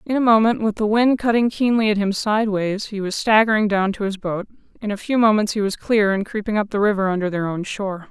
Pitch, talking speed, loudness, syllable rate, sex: 210 Hz, 250 wpm, -19 LUFS, 6.0 syllables/s, female